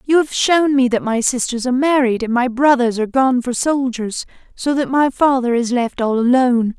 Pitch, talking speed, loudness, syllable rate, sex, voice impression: 255 Hz, 210 wpm, -16 LUFS, 5.2 syllables/s, female, feminine, adult-like, slightly clear, slightly intellectual, slightly strict